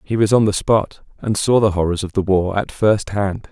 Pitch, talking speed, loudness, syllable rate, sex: 100 Hz, 240 wpm, -17 LUFS, 4.9 syllables/s, male